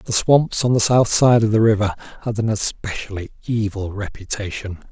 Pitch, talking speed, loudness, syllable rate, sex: 110 Hz, 170 wpm, -19 LUFS, 5.0 syllables/s, male